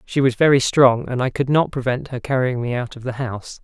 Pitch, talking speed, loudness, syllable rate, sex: 130 Hz, 265 wpm, -19 LUFS, 5.7 syllables/s, male